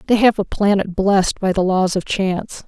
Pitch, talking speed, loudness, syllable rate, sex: 195 Hz, 225 wpm, -17 LUFS, 5.2 syllables/s, female